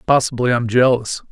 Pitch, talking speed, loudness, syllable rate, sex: 120 Hz, 185 wpm, -16 LUFS, 6.3 syllables/s, male